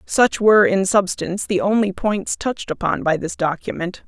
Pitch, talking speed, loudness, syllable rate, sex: 195 Hz, 175 wpm, -19 LUFS, 5.1 syllables/s, female